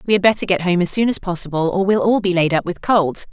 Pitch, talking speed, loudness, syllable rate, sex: 185 Hz, 305 wpm, -17 LUFS, 6.4 syllables/s, female